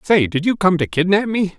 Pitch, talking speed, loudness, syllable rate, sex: 180 Hz, 265 wpm, -17 LUFS, 5.4 syllables/s, male